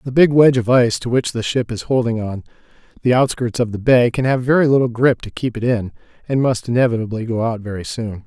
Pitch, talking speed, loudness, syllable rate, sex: 120 Hz, 240 wpm, -17 LUFS, 6.1 syllables/s, male